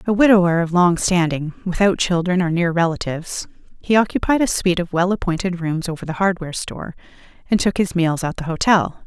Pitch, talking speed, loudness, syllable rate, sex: 180 Hz, 190 wpm, -19 LUFS, 5.9 syllables/s, female